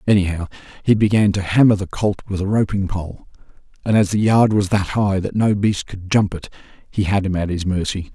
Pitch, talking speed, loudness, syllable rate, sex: 100 Hz, 220 wpm, -18 LUFS, 5.5 syllables/s, male